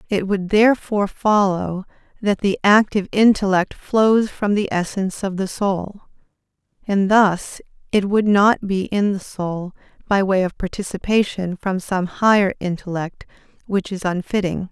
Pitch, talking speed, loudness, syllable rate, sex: 195 Hz, 145 wpm, -19 LUFS, 4.5 syllables/s, female